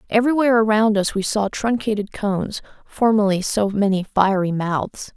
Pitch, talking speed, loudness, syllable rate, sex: 210 Hz, 140 wpm, -19 LUFS, 5.2 syllables/s, female